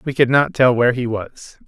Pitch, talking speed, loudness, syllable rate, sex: 125 Hz, 250 wpm, -16 LUFS, 5.3 syllables/s, male